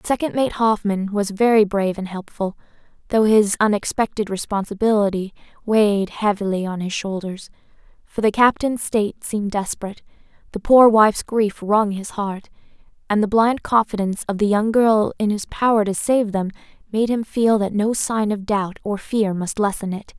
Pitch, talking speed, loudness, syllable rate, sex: 210 Hz, 170 wpm, -19 LUFS, 5.0 syllables/s, female